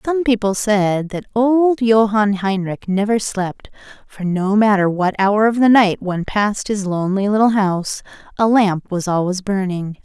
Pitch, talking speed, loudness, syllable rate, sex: 205 Hz, 165 wpm, -17 LUFS, 4.5 syllables/s, female